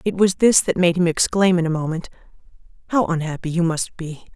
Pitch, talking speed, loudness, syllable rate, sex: 175 Hz, 205 wpm, -19 LUFS, 5.7 syllables/s, female